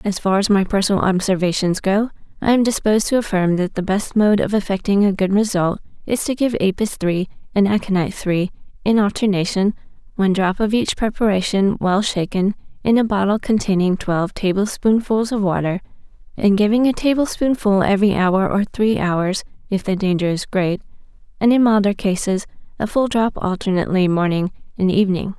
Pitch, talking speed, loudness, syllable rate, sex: 200 Hz, 170 wpm, -18 LUFS, 5.5 syllables/s, female